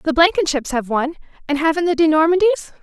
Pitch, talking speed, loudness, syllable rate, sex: 315 Hz, 190 wpm, -17 LUFS, 7.3 syllables/s, female